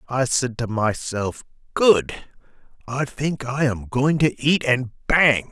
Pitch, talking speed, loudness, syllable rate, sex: 130 Hz, 150 wpm, -21 LUFS, 3.4 syllables/s, male